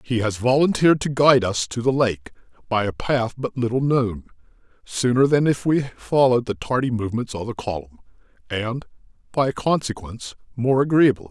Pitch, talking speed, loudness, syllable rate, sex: 120 Hz, 165 wpm, -21 LUFS, 5.4 syllables/s, male